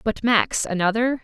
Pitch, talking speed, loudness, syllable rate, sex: 225 Hz, 145 wpm, -21 LUFS, 4.4 syllables/s, female